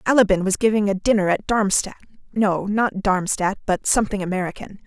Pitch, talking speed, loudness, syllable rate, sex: 200 Hz, 160 wpm, -20 LUFS, 5.6 syllables/s, female